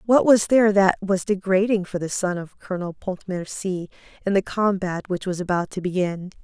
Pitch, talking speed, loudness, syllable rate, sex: 190 Hz, 185 wpm, -22 LUFS, 5.3 syllables/s, female